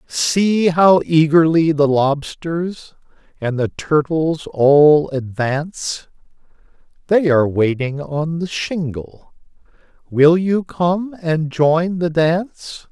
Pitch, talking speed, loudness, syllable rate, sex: 160 Hz, 100 wpm, -17 LUFS, 3.1 syllables/s, male